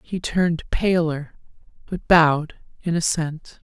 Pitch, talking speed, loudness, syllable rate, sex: 165 Hz, 115 wpm, -21 LUFS, 3.9 syllables/s, female